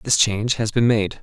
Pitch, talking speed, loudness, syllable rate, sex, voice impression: 110 Hz, 245 wpm, -19 LUFS, 5.6 syllables/s, male, masculine, adult-like, bright, clear, fluent, cool, slightly intellectual, refreshing, friendly, reassuring, kind, light